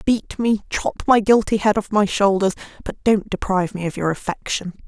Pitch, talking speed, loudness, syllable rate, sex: 205 Hz, 195 wpm, -20 LUFS, 5.2 syllables/s, female